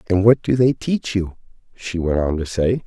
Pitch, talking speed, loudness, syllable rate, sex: 100 Hz, 230 wpm, -19 LUFS, 4.7 syllables/s, male